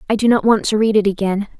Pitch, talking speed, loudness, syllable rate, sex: 210 Hz, 300 wpm, -16 LUFS, 6.8 syllables/s, female